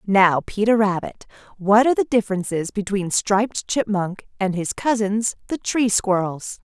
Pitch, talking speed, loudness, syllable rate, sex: 205 Hz, 145 wpm, -20 LUFS, 4.6 syllables/s, female